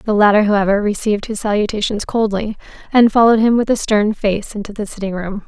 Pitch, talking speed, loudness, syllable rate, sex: 210 Hz, 195 wpm, -16 LUFS, 6.1 syllables/s, female